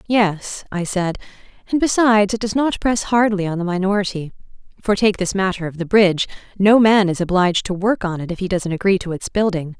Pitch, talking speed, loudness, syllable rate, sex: 195 Hz, 215 wpm, -18 LUFS, 5.8 syllables/s, female